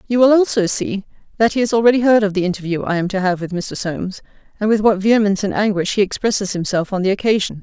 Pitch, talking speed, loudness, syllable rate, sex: 205 Hz, 245 wpm, -17 LUFS, 6.8 syllables/s, female